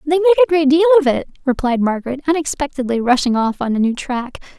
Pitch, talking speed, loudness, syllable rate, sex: 280 Hz, 210 wpm, -16 LUFS, 6.6 syllables/s, female